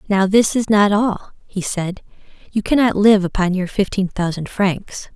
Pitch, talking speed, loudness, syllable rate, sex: 200 Hz, 175 wpm, -17 LUFS, 4.3 syllables/s, female